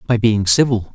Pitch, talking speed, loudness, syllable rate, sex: 115 Hz, 190 wpm, -15 LUFS, 5.1 syllables/s, male